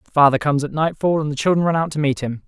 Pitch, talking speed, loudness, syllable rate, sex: 150 Hz, 315 wpm, -19 LUFS, 7.2 syllables/s, male